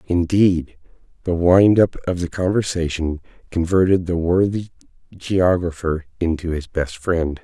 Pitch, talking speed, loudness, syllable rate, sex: 85 Hz, 120 wpm, -19 LUFS, 4.3 syllables/s, male